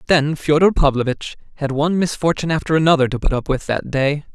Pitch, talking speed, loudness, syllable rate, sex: 150 Hz, 195 wpm, -18 LUFS, 6.3 syllables/s, male